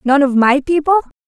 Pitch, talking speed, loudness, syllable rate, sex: 290 Hz, 190 wpm, -14 LUFS, 5.2 syllables/s, female